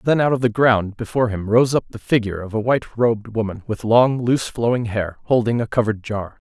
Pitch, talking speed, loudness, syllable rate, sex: 115 Hz, 230 wpm, -19 LUFS, 6.1 syllables/s, male